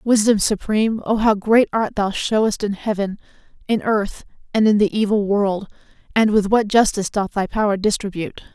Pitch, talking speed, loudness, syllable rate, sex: 210 Hz, 175 wpm, -19 LUFS, 5.2 syllables/s, female